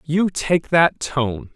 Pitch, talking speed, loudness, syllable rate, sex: 150 Hz, 155 wpm, -19 LUFS, 2.9 syllables/s, male